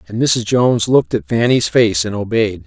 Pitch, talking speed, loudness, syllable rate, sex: 115 Hz, 200 wpm, -15 LUFS, 5.2 syllables/s, male